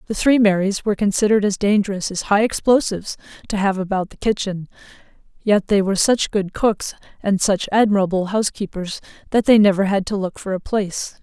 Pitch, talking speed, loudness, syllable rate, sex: 200 Hz, 180 wpm, -19 LUFS, 5.8 syllables/s, female